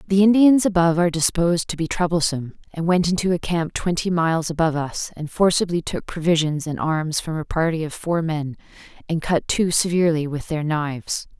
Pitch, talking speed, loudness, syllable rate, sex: 165 Hz, 190 wpm, -21 LUFS, 5.6 syllables/s, female